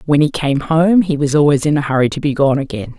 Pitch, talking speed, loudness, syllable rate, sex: 145 Hz, 280 wpm, -15 LUFS, 6.0 syllables/s, female